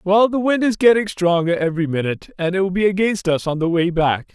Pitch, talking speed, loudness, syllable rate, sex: 185 Hz, 250 wpm, -18 LUFS, 6.0 syllables/s, male